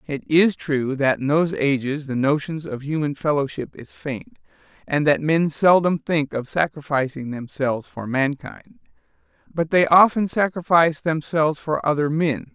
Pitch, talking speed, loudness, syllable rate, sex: 150 Hz, 155 wpm, -21 LUFS, 4.6 syllables/s, male